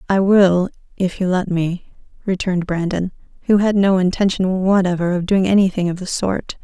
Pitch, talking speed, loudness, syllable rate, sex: 185 Hz, 170 wpm, -18 LUFS, 5.1 syllables/s, female